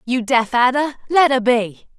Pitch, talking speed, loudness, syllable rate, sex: 250 Hz, 180 wpm, -16 LUFS, 4.7 syllables/s, female